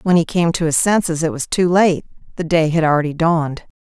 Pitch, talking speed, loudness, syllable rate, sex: 165 Hz, 235 wpm, -17 LUFS, 5.8 syllables/s, female